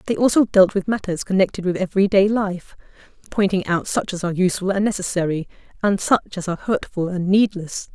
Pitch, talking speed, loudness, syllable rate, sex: 190 Hz, 190 wpm, -20 LUFS, 6.0 syllables/s, female